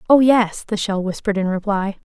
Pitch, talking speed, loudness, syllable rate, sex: 205 Hz, 200 wpm, -19 LUFS, 5.4 syllables/s, female